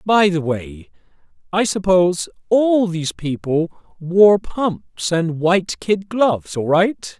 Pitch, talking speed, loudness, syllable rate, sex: 175 Hz, 135 wpm, -18 LUFS, 3.7 syllables/s, male